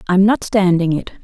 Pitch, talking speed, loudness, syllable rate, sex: 190 Hz, 195 wpm, -15 LUFS, 5.0 syllables/s, female